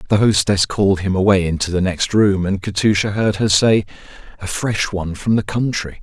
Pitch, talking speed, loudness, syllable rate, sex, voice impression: 100 Hz, 200 wpm, -17 LUFS, 5.3 syllables/s, male, masculine, middle-aged, thick, powerful, soft, slightly muffled, raspy, intellectual, mature, slightly friendly, reassuring, wild, slightly lively, kind